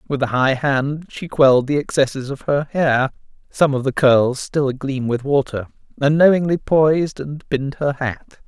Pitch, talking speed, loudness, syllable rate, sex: 140 Hz, 170 wpm, -18 LUFS, 4.7 syllables/s, male